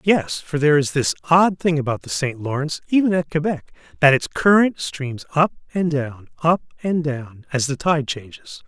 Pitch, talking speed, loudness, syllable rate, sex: 150 Hz, 195 wpm, -20 LUFS, 4.9 syllables/s, male